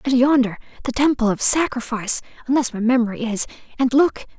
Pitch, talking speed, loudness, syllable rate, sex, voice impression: 245 Hz, 150 wpm, -19 LUFS, 6.0 syllables/s, female, feminine, slightly young, slightly thin, slightly bright, soft, slightly muffled, fluent, slightly cute, calm, friendly, elegant, kind, modest